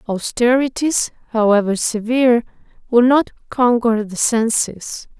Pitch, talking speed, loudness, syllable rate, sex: 235 Hz, 90 wpm, -17 LUFS, 4.0 syllables/s, female